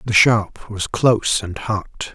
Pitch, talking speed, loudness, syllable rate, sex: 105 Hz, 170 wpm, -18 LUFS, 3.5 syllables/s, male